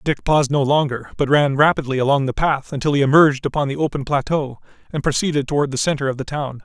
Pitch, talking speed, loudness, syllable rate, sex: 140 Hz, 225 wpm, -18 LUFS, 6.5 syllables/s, male